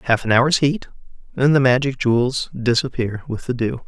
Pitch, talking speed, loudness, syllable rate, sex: 125 Hz, 185 wpm, -19 LUFS, 5.1 syllables/s, male